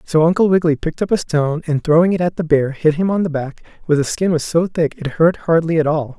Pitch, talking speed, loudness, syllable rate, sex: 160 Hz, 280 wpm, -17 LUFS, 6.4 syllables/s, male